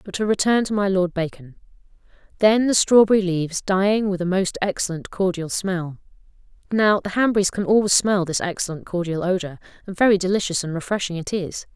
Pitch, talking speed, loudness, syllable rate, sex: 190 Hz, 180 wpm, -21 LUFS, 5.8 syllables/s, female